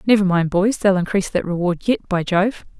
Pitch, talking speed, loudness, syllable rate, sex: 190 Hz, 215 wpm, -19 LUFS, 5.8 syllables/s, female